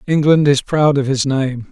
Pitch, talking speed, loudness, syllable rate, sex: 140 Hz, 210 wpm, -15 LUFS, 4.5 syllables/s, male